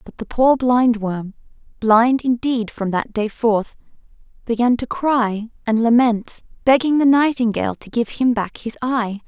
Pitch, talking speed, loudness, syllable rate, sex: 235 Hz, 155 wpm, -18 LUFS, 4.4 syllables/s, female